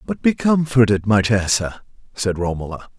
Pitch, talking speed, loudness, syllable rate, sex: 110 Hz, 140 wpm, -18 LUFS, 4.9 syllables/s, male